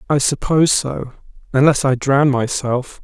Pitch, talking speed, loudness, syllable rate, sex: 135 Hz, 120 wpm, -16 LUFS, 4.5 syllables/s, male